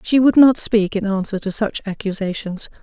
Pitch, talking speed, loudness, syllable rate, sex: 210 Hz, 190 wpm, -18 LUFS, 5.0 syllables/s, female